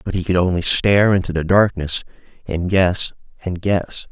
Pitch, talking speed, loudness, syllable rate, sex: 90 Hz, 175 wpm, -18 LUFS, 4.9 syllables/s, male